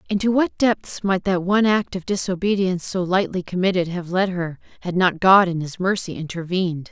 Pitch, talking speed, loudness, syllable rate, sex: 185 Hz, 190 wpm, -21 LUFS, 5.4 syllables/s, female